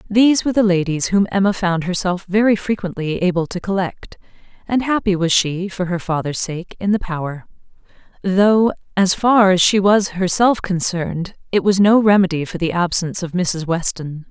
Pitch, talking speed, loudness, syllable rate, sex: 185 Hz, 175 wpm, -17 LUFS, 5.1 syllables/s, female